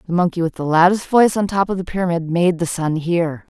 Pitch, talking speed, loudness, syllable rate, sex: 175 Hz, 250 wpm, -18 LUFS, 6.0 syllables/s, female